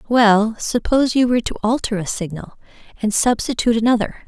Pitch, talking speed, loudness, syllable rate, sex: 225 Hz, 155 wpm, -18 LUFS, 6.0 syllables/s, female